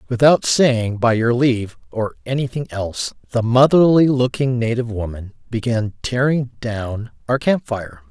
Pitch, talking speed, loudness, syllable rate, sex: 120 Hz, 140 wpm, -18 LUFS, 4.5 syllables/s, male